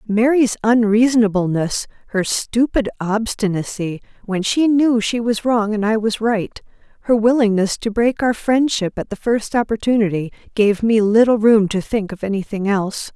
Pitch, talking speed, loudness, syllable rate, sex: 220 Hz, 155 wpm, -17 LUFS, 4.8 syllables/s, female